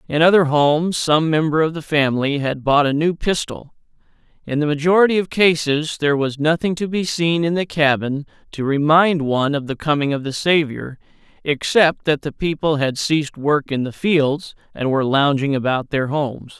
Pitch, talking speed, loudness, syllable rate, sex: 150 Hz, 190 wpm, -18 LUFS, 5.1 syllables/s, male